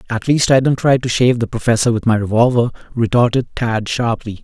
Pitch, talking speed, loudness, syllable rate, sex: 120 Hz, 205 wpm, -16 LUFS, 5.8 syllables/s, male